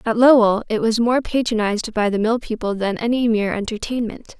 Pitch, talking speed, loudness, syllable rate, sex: 225 Hz, 190 wpm, -19 LUFS, 5.7 syllables/s, female